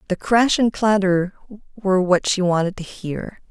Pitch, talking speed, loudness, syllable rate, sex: 195 Hz, 170 wpm, -19 LUFS, 4.6 syllables/s, female